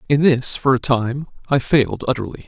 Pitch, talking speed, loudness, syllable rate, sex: 130 Hz, 195 wpm, -18 LUFS, 5.4 syllables/s, male